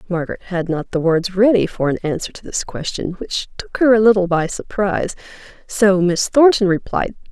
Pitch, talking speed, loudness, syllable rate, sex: 190 Hz, 190 wpm, -17 LUFS, 5.3 syllables/s, female